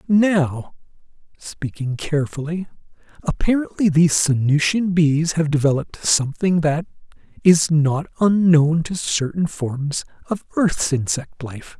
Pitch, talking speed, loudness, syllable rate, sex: 160 Hz, 105 wpm, -19 LUFS, 4.2 syllables/s, male